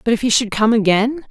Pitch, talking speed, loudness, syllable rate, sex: 230 Hz, 275 wpm, -16 LUFS, 6.3 syllables/s, female